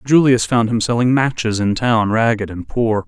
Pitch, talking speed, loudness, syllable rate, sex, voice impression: 115 Hz, 195 wpm, -16 LUFS, 4.7 syllables/s, male, masculine, adult-like, tensed, powerful, slightly bright, clear, fluent, intellectual, calm, wild, lively, slightly strict